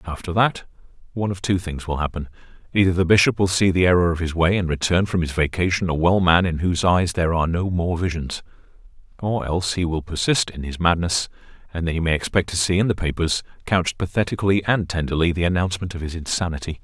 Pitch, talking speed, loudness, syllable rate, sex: 90 Hz, 215 wpm, -21 LUFS, 6.4 syllables/s, male